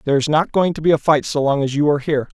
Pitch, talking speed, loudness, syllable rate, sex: 150 Hz, 325 wpm, -17 LUFS, 7.3 syllables/s, male